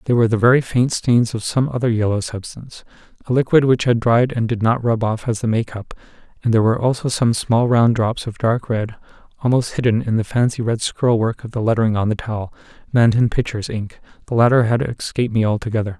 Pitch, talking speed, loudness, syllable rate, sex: 115 Hz, 215 wpm, -18 LUFS, 6.1 syllables/s, male